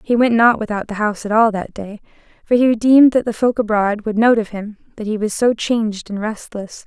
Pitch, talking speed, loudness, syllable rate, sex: 220 Hz, 245 wpm, -16 LUFS, 5.6 syllables/s, female